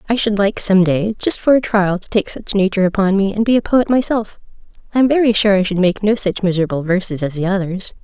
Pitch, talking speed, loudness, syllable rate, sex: 200 Hz, 255 wpm, -16 LUFS, 6.1 syllables/s, female